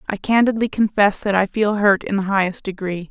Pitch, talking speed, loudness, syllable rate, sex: 200 Hz, 210 wpm, -18 LUFS, 5.5 syllables/s, female